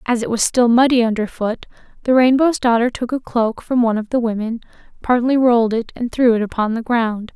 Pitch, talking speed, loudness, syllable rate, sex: 235 Hz, 210 wpm, -17 LUFS, 5.6 syllables/s, female